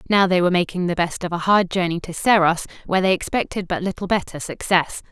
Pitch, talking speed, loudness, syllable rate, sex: 180 Hz, 225 wpm, -20 LUFS, 6.3 syllables/s, female